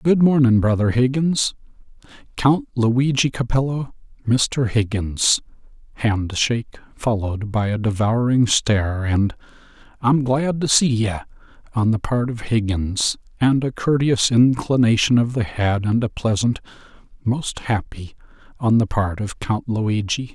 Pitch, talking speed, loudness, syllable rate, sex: 115 Hz, 125 wpm, -20 LUFS, 4.2 syllables/s, male